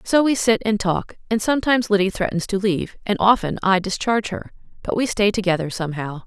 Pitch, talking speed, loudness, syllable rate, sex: 200 Hz, 200 wpm, -20 LUFS, 6.1 syllables/s, female